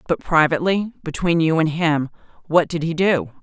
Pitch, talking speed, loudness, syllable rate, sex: 160 Hz, 140 wpm, -19 LUFS, 5.2 syllables/s, female